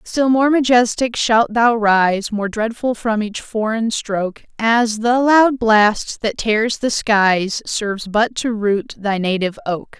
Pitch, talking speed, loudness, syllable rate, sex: 220 Hz, 160 wpm, -17 LUFS, 3.6 syllables/s, female